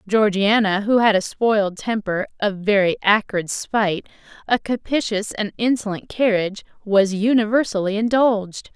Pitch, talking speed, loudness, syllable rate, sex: 210 Hz, 125 wpm, -20 LUFS, 4.7 syllables/s, female